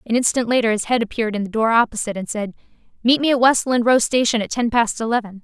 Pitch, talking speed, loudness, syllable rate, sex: 230 Hz, 245 wpm, -18 LUFS, 6.9 syllables/s, female